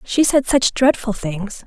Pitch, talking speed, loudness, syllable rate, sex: 235 Hz, 180 wpm, -17 LUFS, 3.8 syllables/s, female